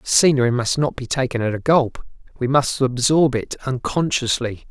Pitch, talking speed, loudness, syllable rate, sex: 130 Hz, 165 wpm, -19 LUFS, 4.8 syllables/s, male